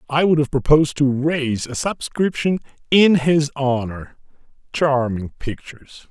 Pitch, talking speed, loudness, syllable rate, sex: 140 Hz, 130 wpm, -19 LUFS, 4.4 syllables/s, male